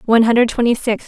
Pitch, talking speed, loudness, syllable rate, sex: 235 Hz, 225 wpm, -15 LUFS, 7.5 syllables/s, female